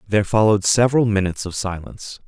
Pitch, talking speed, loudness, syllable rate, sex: 105 Hz, 160 wpm, -18 LUFS, 7.3 syllables/s, male